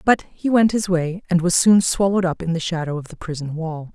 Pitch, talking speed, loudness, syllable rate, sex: 175 Hz, 260 wpm, -20 LUFS, 5.6 syllables/s, female